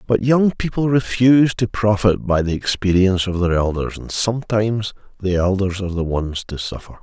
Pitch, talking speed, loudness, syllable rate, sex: 100 Hz, 180 wpm, -18 LUFS, 5.4 syllables/s, male